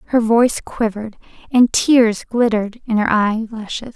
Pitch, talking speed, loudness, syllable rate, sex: 225 Hz, 135 wpm, -17 LUFS, 4.6 syllables/s, female